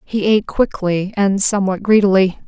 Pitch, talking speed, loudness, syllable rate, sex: 195 Hz, 145 wpm, -16 LUFS, 5.2 syllables/s, female